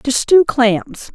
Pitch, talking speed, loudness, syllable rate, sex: 255 Hz, 155 wpm, -14 LUFS, 2.7 syllables/s, female